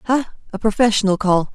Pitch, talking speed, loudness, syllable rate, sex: 210 Hz, 155 wpm, -18 LUFS, 5.8 syllables/s, female